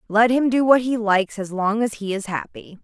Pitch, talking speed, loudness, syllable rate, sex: 215 Hz, 255 wpm, -20 LUFS, 5.3 syllables/s, female